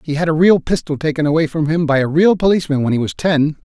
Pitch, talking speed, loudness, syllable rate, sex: 155 Hz, 275 wpm, -15 LUFS, 6.5 syllables/s, male